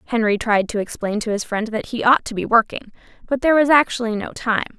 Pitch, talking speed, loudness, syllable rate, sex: 225 Hz, 240 wpm, -19 LUFS, 6.1 syllables/s, female